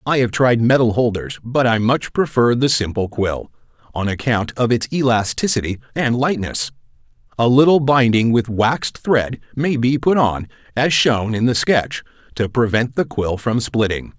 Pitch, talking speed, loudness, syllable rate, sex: 120 Hz, 170 wpm, -17 LUFS, 4.6 syllables/s, male